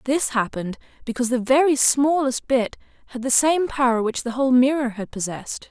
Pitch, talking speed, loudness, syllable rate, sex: 255 Hz, 180 wpm, -21 LUFS, 5.7 syllables/s, female